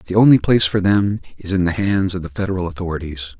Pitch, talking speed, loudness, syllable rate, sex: 95 Hz, 230 wpm, -18 LUFS, 6.9 syllables/s, male